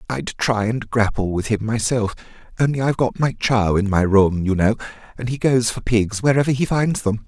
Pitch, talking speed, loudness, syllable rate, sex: 115 Hz, 215 wpm, -19 LUFS, 5.2 syllables/s, male